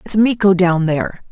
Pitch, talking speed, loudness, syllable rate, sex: 190 Hz, 185 wpm, -15 LUFS, 5.2 syllables/s, female